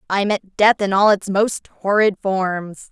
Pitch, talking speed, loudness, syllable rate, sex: 200 Hz, 185 wpm, -18 LUFS, 3.8 syllables/s, female